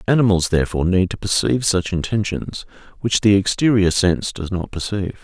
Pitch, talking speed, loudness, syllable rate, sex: 95 Hz, 160 wpm, -19 LUFS, 5.9 syllables/s, male